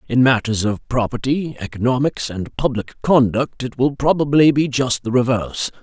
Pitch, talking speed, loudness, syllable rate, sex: 125 Hz, 155 wpm, -18 LUFS, 5.0 syllables/s, male